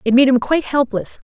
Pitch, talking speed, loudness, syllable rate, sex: 260 Hz, 230 wpm, -16 LUFS, 6.1 syllables/s, female